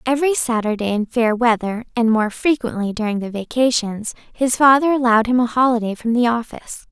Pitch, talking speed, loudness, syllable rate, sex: 235 Hz, 175 wpm, -18 LUFS, 5.7 syllables/s, female